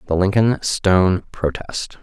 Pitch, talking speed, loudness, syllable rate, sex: 95 Hz, 120 wpm, -18 LUFS, 4.0 syllables/s, male